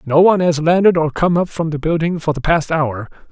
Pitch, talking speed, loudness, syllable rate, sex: 160 Hz, 255 wpm, -16 LUFS, 5.7 syllables/s, male